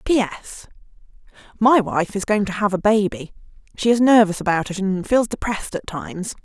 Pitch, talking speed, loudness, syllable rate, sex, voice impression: 200 Hz, 175 wpm, -19 LUFS, 5.1 syllables/s, female, feminine, adult-like, tensed, powerful, slightly hard, fluent, raspy, intellectual, slightly wild, lively, intense